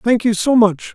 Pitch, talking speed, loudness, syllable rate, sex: 220 Hz, 255 wpm, -15 LUFS, 4.7 syllables/s, male